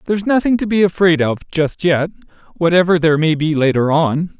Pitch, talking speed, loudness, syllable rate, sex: 165 Hz, 190 wpm, -15 LUFS, 5.6 syllables/s, male